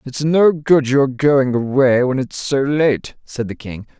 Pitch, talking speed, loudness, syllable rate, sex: 135 Hz, 195 wpm, -16 LUFS, 3.7 syllables/s, male